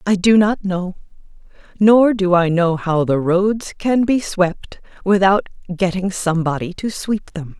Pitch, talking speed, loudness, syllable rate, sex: 190 Hz, 160 wpm, -17 LUFS, 4.1 syllables/s, female